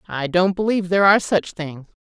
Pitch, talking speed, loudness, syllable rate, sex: 180 Hz, 205 wpm, -18 LUFS, 6.3 syllables/s, female